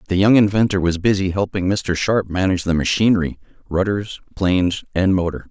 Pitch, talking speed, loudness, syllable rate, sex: 95 Hz, 165 wpm, -18 LUFS, 5.7 syllables/s, male